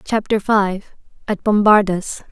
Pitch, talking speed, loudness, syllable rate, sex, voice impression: 205 Hz, 80 wpm, -17 LUFS, 3.8 syllables/s, female, very feminine, young, thin, tensed, slightly powerful, bright, slightly soft, clear, fluent, slightly raspy, very cute, intellectual, refreshing, very sincere, calm, very friendly, very reassuring, unique, very elegant, slightly wild, sweet, lively, kind, slightly intense, slightly modest, light